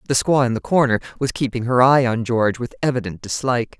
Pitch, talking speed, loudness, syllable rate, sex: 125 Hz, 220 wpm, -19 LUFS, 6.3 syllables/s, female